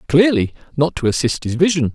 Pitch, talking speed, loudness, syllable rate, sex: 150 Hz, 185 wpm, -17 LUFS, 5.8 syllables/s, male